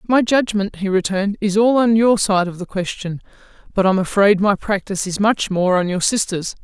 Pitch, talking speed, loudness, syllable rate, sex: 200 Hz, 215 wpm, -17 LUFS, 5.4 syllables/s, female